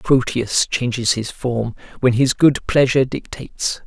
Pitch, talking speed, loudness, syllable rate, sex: 125 Hz, 140 wpm, -18 LUFS, 4.3 syllables/s, male